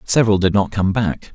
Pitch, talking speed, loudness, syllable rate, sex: 100 Hz, 225 wpm, -17 LUFS, 5.6 syllables/s, male